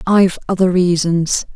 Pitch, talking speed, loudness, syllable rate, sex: 180 Hz, 115 wpm, -15 LUFS, 4.7 syllables/s, female